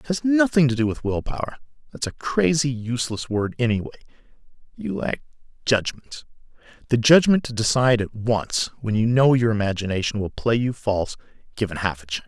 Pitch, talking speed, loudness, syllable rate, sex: 120 Hz, 170 wpm, -22 LUFS, 5.8 syllables/s, male